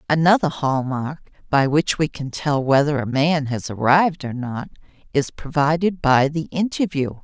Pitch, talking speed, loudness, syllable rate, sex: 145 Hz, 165 wpm, -20 LUFS, 4.5 syllables/s, female